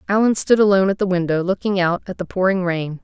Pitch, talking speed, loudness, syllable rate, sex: 185 Hz, 235 wpm, -18 LUFS, 6.3 syllables/s, female